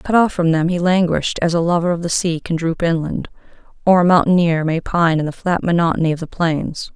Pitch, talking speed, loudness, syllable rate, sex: 170 Hz, 235 wpm, -17 LUFS, 5.7 syllables/s, female